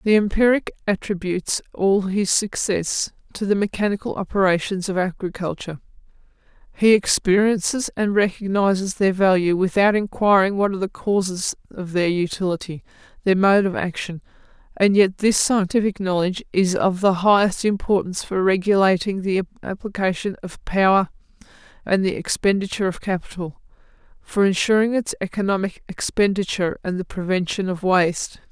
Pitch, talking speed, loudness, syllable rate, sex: 190 Hz, 130 wpm, -20 LUFS, 5.4 syllables/s, female